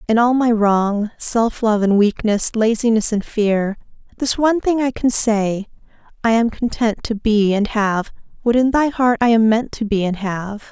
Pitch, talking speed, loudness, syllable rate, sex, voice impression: 220 Hz, 195 wpm, -17 LUFS, 4.4 syllables/s, female, feminine, adult-like, slightly tensed, slightly powerful, clear, slightly fluent, intellectual, calm, slightly friendly, reassuring, kind, slightly modest